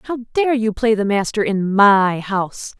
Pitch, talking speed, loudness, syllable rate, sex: 210 Hz, 195 wpm, -17 LUFS, 4.3 syllables/s, female